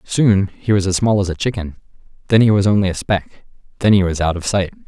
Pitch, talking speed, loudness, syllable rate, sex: 95 Hz, 245 wpm, -17 LUFS, 6.2 syllables/s, male